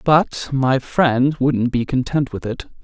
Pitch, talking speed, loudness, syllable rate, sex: 130 Hz, 170 wpm, -19 LUFS, 3.5 syllables/s, male